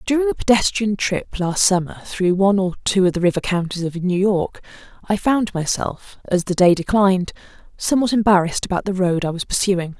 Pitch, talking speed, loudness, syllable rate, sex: 190 Hz, 190 wpm, -19 LUFS, 5.6 syllables/s, female